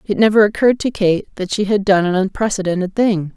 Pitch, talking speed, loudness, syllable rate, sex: 200 Hz, 215 wpm, -16 LUFS, 6.0 syllables/s, female